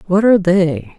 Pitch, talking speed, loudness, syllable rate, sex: 180 Hz, 185 wpm, -14 LUFS, 4.8 syllables/s, female